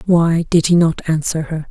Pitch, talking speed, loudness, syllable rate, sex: 165 Hz, 210 wpm, -16 LUFS, 4.5 syllables/s, female